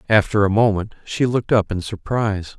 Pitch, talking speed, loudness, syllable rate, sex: 105 Hz, 185 wpm, -19 LUFS, 5.6 syllables/s, male